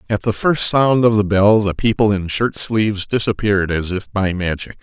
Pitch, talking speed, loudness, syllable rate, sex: 105 Hz, 210 wpm, -16 LUFS, 5.0 syllables/s, male